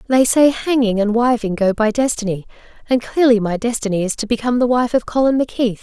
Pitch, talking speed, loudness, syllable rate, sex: 235 Hz, 205 wpm, -17 LUFS, 6.1 syllables/s, female